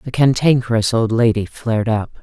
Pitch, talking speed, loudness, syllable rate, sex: 115 Hz, 160 wpm, -17 LUFS, 5.5 syllables/s, female